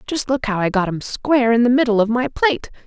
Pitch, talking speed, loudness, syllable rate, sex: 235 Hz, 270 wpm, -18 LUFS, 6.2 syllables/s, female